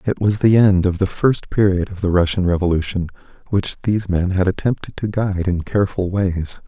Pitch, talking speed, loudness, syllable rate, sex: 95 Hz, 200 wpm, -18 LUFS, 5.5 syllables/s, male